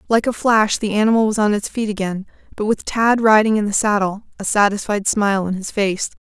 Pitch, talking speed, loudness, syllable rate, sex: 210 Hz, 220 wpm, -18 LUFS, 5.6 syllables/s, female